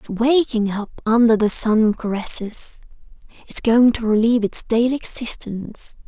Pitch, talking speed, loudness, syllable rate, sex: 225 Hz, 140 wpm, -18 LUFS, 4.7 syllables/s, female